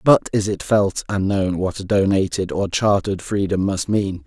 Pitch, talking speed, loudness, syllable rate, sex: 95 Hz, 195 wpm, -20 LUFS, 4.7 syllables/s, male